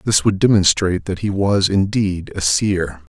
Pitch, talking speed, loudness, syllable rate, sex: 95 Hz, 170 wpm, -17 LUFS, 4.5 syllables/s, male